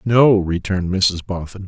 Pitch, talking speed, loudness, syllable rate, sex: 95 Hz, 145 wpm, -18 LUFS, 4.6 syllables/s, male